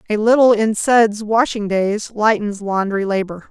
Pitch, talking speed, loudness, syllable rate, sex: 215 Hz, 155 wpm, -16 LUFS, 4.2 syllables/s, female